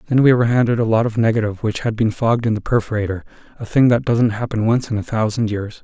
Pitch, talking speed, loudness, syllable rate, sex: 115 Hz, 255 wpm, -18 LUFS, 6.8 syllables/s, male